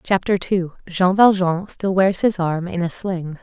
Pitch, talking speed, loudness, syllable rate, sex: 180 Hz, 175 wpm, -19 LUFS, 4.1 syllables/s, female